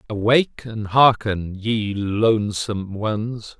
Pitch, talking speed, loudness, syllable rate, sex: 110 Hz, 100 wpm, -20 LUFS, 3.6 syllables/s, male